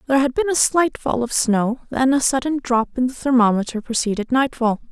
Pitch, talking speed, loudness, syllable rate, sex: 255 Hz, 205 wpm, -19 LUFS, 5.6 syllables/s, female